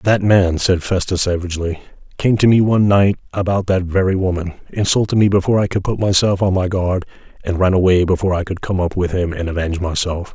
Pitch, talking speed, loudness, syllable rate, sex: 95 Hz, 215 wpm, -17 LUFS, 6.2 syllables/s, male